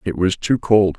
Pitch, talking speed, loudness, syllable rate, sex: 100 Hz, 245 wpm, -18 LUFS, 4.6 syllables/s, male